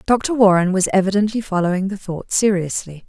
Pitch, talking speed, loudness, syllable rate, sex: 195 Hz, 155 wpm, -18 LUFS, 5.4 syllables/s, female